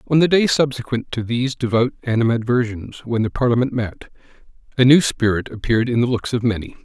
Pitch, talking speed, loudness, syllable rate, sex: 120 Hz, 185 wpm, -19 LUFS, 6.0 syllables/s, male